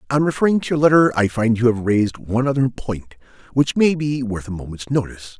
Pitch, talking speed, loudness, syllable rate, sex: 125 Hz, 220 wpm, -19 LUFS, 6.1 syllables/s, male